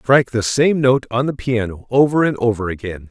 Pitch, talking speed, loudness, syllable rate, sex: 120 Hz, 210 wpm, -17 LUFS, 5.4 syllables/s, male